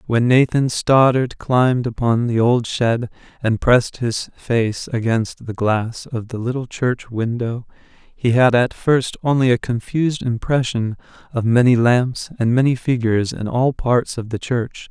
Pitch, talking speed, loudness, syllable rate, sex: 120 Hz, 160 wpm, -18 LUFS, 4.2 syllables/s, male